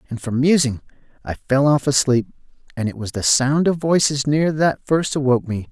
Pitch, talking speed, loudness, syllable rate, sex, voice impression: 135 Hz, 200 wpm, -18 LUFS, 5.3 syllables/s, male, very masculine, adult-like, slightly thick, sincere, slightly calm, slightly kind